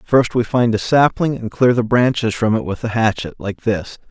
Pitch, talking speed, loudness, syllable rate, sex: 115 Hz, 220 wpm, -17 LUFS, 5.0 syllables/s, male